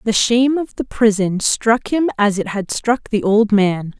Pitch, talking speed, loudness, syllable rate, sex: 220 Hz, 210 wpm, -17 LUFS, 4.3 syllables/s, female